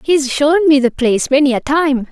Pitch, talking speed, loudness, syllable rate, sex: 280 Hz, 225 wpm, -13 LUFS, 5.0 syllables/s, female